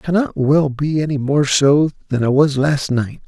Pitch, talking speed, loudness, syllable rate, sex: 145 Hz, 220 wpm, -16 LUFS, 4.7 syllables/s, male